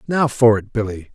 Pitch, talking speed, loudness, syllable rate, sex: 115 Hz, 210 wpm, -18 LUFS, 5.3 syllables/s, male